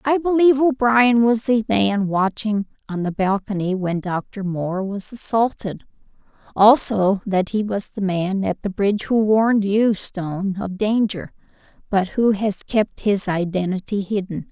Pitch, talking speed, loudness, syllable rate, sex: 205 Hz, 155 wpm, -20 LUFS, 4.3 syllables/s, female